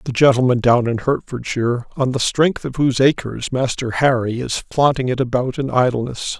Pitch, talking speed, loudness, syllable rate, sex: 125 Hz, 180 wpm, -18 LUFS, 5.3 syllables/s, male